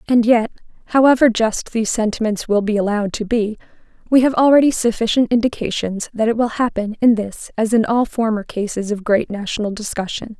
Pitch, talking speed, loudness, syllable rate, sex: 225 Hz, 180 wpm, -17 LUFS, 5.7 syllables/s, female